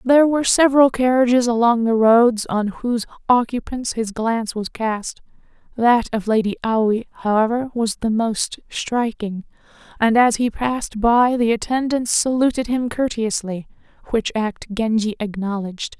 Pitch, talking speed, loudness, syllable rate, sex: 230 Hz, 140 wpm, -19 LUFS, 4.7 syllables/s, female